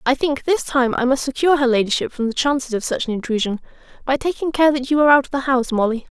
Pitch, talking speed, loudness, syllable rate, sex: 265 Hz, 265 wpm, -19 LUFS, 6.9 syllables/s, female